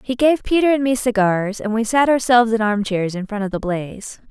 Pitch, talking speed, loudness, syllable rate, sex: 225 Hz, 235 wpm, -18 LUFS, 5.6 syllables/s, female